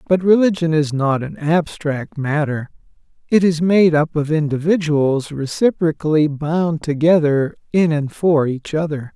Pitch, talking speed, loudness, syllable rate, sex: 155 Hz, 140 wpm, -17 LUFS, 4.3 syllables/s, male